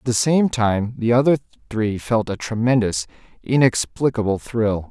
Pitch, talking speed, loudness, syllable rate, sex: 115 Hz, 145 wpm, -20 LUFS, 4.6 syllables/s, male